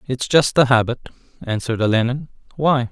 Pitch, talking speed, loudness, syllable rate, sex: 125 Hz, 145 wpm, -18 LUFS, 5.7 syllables/s, male